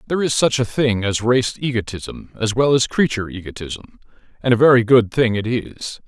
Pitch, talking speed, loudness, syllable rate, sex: 120 Hz, 200 wpm, -18 LUFS, 5.4 syllables/s, male